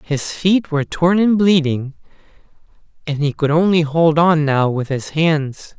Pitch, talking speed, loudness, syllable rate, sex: 160 Hz, 165 wpm, -16 LUFS, 4.2 syllables/s, male